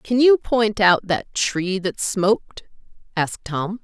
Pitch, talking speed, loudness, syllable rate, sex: 205 Hz, 155 wpm, -20 LUFS, 3.7 syllables/s, female